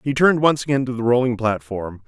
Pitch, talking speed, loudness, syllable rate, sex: 120 Hz, 230 wpm, -19 LUFS, 6.1 syllables/s, male